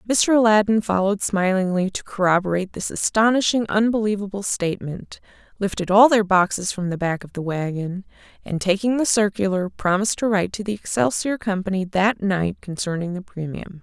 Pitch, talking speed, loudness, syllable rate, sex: 195 Hz, 155 wpm, -21 LUFS, 5.6 syllables/s, female